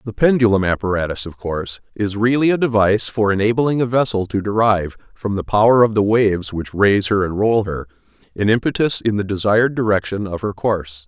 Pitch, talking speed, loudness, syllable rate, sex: 105 Hz, 195 wpm, -18 LUFS, 5.9 syllables/s, male